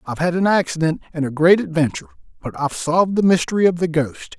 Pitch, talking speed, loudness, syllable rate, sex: 160 Hz, 220 wpm, -18 LUFS, 6.8 syllables/s, male